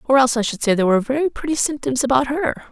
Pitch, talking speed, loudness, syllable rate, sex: 255 Hz, 265 wpm, -19 LUFS, 7.7 syllables/s, female